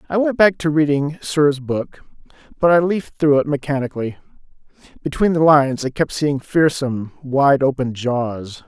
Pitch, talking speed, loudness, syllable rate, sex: 145 Hz, 160 wpm, -18 LUFS, 4.9 syllables/s, male